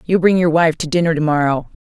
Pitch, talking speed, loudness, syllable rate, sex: 165 Hz, 260 wpm, -16 LUFS, 6.1 syllables/s, female